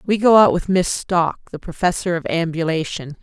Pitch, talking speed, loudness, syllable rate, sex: 175 Hz, 185 wpm, -18 LUFS, 5.1 syllables/s, female